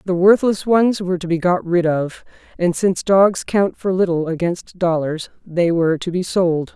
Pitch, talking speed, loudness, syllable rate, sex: 180 Hz, 195 wpm, -18 LUFS, 4.7 syllables/s, female